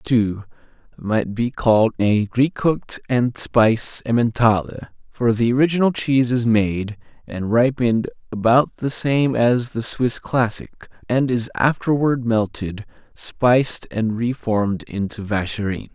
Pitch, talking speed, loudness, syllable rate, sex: 115 Hz, 130 wpm, -19 LUFS, 4.1 syllables/s, male